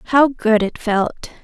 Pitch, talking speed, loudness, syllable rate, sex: 235 Hz, 165 wpm, -17 LUFS, 3.6 syllables/s, female